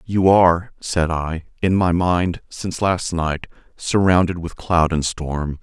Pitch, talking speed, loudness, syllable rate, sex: 85 Hz, 160 wpm, -19 LUFS, 4.1 syllables/s, male